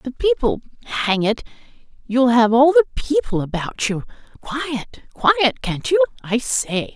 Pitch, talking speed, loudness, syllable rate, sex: 255 Hz, 110 wpm, -19 LUFS, 4.1 syllables/s, female